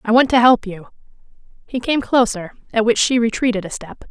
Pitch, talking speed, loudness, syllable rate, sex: 230 Hz, 205 wpm, -17 LUFS, 5.8 syllables/s, female